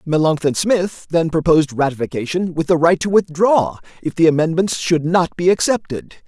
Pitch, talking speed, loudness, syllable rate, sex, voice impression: 165 Hz, 165 wpm, -17 LUFS, 5.2 syllables/s, male, masculine, adult-like, powerful, very fluent, slightly cool, slightly unique, slightly intense